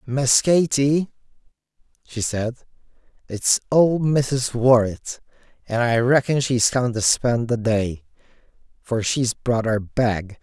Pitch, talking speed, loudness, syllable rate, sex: 120 Hz, 125 wpm, -20 LUFS, 3.5 syllables/s, male